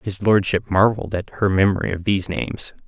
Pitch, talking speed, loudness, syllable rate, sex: 100 Hz, 190 wpm, -20 LUFS, 6.0 syllables/s, male